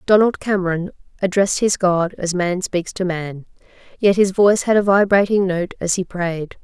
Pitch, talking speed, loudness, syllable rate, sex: 185 Hz, 180 wpm, -18 LUFS, 5.0 syllables/s, female